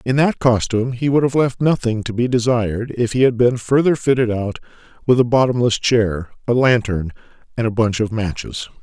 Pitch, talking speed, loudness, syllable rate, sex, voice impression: 120 Hz, 195 wpm, -18 LUFS, 5.3 syllables/s, male, very masculine, very adult-like, slightly thick, slightly muffled, cool, sincere, slightly kind